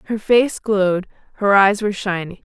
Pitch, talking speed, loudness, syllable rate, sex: 200 Hz, 165 wpm, -17 LUFS, 5.2 syllables/s, female